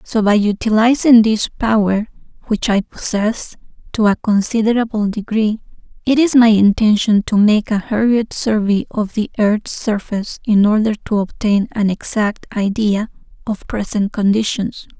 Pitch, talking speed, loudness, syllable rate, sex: 215 Hz, 140 wpm, -16 LUFS, 4.5 syllables/s, female